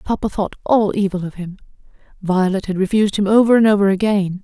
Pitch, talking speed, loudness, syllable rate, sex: 200 Hz, 190 wpm, -17 LUFS, 6.1 syllables/s, female